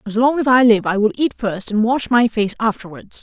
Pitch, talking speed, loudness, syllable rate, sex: 225 Hz, 260 wpm, -16 LUFS, 5.5 syllables/s, female